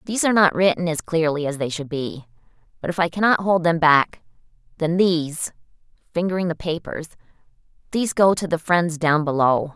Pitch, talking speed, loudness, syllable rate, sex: 165 Hz, 165 wpm, -21 LUFS, 5.7 syllables/s, female